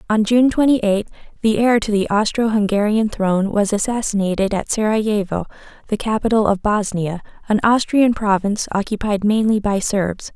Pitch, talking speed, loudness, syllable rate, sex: 210 Hz, 150 wpm, -18 LUFS, 5.2 syllables/s, female